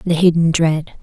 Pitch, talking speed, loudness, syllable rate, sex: 165 Hz, 175 wpm, -15 LUFS, 4.4 syllables/s, female